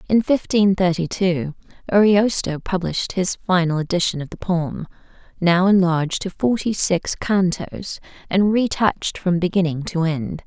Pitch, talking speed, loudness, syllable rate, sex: 180 Hz, 140 wpm, -20 LUFS, 4.5 syllables/s, female